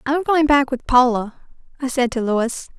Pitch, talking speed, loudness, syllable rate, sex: 260 Hz, 195 wpm, -18 LUFS, 4.7 syllables/s, female